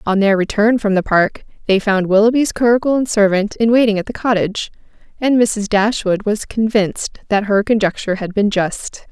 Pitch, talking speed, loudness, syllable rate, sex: 210 Hz, 185 wpm, -16 LUFS, 5.3 syllables/s, female